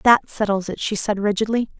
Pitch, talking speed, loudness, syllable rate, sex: 210 Hz, 200 wpm, -21 LUFS, 5.3 syllables/s, female